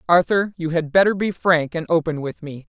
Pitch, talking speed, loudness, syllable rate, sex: 165 Hz, 215 wpm, -20 LUFS, 5.3 syllables/s, female